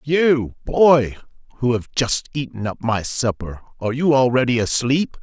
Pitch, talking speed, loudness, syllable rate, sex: 125 Hz, 150 wpm, -19 LUFS, 4.4 syllables/s, male